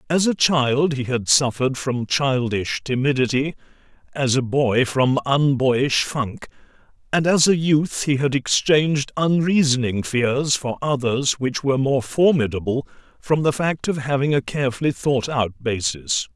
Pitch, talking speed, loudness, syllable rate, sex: 135 Hz, 145 wpm, -20 LUFS, 4.3 syllables/s, male